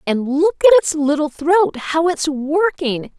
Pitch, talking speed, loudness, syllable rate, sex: 315 Hz, 170 wpm, -16 LUFS, 3.8 syllables/s, female